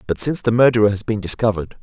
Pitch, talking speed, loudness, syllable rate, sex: 110 Hz, 230 wpm, -18 LUFS, 7.8 syllables/s, male